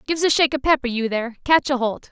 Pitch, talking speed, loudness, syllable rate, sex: 265 Hz, 255 wpm, -20 LUFS, 7.5 syllables/s, female